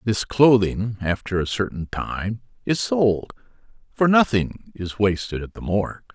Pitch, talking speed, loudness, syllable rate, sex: 105 Hz, 135 wpm, -22 LUFS, 4.1 syllables/s, male